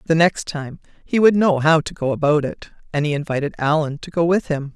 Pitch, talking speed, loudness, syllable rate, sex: 155 Hz, 240 wpm, -19 LUFS, 5.6 syllables/s, female